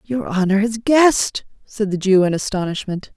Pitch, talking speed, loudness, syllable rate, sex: 205 Hz, 170 wpm, -18 LUFS, 4.9 syllables/s, female